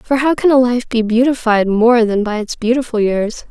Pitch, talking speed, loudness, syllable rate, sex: 235 Hz, 225 wpm, -14 LUFS, 4.9 syllables/s, female